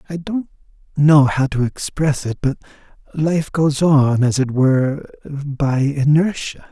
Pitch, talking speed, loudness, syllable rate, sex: 145 Hz, 145 wpm, -17 LUFS, 3.7 syllables/s, male